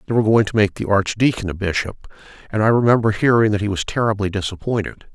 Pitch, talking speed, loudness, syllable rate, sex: 105 Hz, 210 wpm, -18 LUFS, 6.8 syllables/s, male